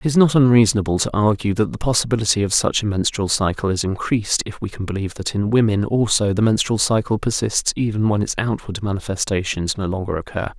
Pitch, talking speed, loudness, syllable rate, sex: 105 Hz, 205 wpm, -19 LUFS, 6.1 syllables/s, male